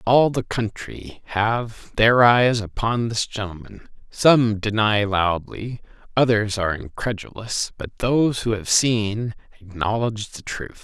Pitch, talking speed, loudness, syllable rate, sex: 110 Hz, 125 wpm, -21 LUFS, 3.9 syllables/s, male